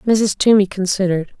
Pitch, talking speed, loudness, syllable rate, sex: 195 Hz, 130 wpm, -16 LUFS, 5.8 syllables/s, female